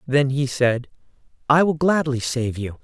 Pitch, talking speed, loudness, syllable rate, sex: 135 Hz, 170 wpm, -20 LUFS, 4.3 syllables/s, male